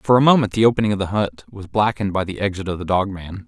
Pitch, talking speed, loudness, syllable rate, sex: 100 Hz, 295 wpm, -19 LUFS, 6.8 syllables/s, male